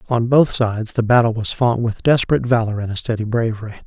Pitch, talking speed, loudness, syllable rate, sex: 115 Hz, 215 wpm, -18 LUFS, 6.5 syllables/s, male